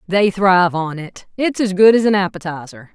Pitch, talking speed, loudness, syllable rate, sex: 190 Hz, 205 wpm, -15 LUFS, 5.2 syllables/s, female